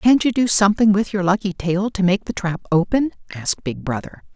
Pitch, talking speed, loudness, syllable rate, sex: 195 Hz, 220 wpm, -19 LUFS, 5.7 syllables/s, female